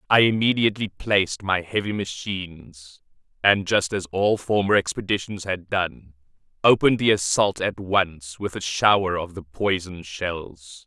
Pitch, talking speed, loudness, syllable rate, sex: 95 Hz, 145 wpm, -22 LUFS, 4.4 syllables/s, male